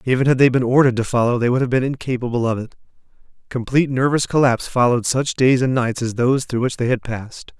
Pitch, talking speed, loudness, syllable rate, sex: 125 Hz, 230 wpm, -18 LUFS, 6.7 syllables/s, male